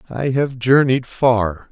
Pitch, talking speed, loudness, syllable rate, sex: 125 Hz, 140 wpm, -17 LUFS, 3.3 syllables/s, male